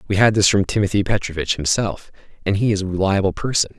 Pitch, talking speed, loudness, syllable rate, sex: 100 Hz, 205 wpm, -19 LUFS, 6.4 syllables/s, male